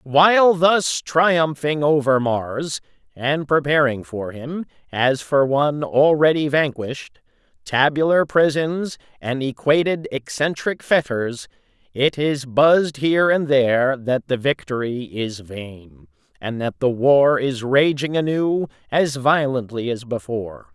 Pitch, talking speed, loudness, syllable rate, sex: 140 Hz, 120 wpm, -19 LUFS, 3.9 syllables/s, male